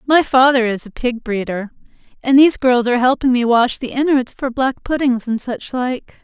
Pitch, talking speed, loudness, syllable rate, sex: 250 Hz, 200 wpm, -16 LUFS, 5.2 syllables/s, female